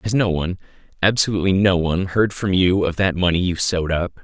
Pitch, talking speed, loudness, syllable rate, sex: 90 Hz, 215 wpm, -19 LUFS, 6.2 syllables/s, male